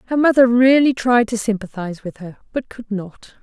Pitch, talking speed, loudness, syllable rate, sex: 225 Hz, 195 wpm, -17 LUFS, 5.3 syllables/s, female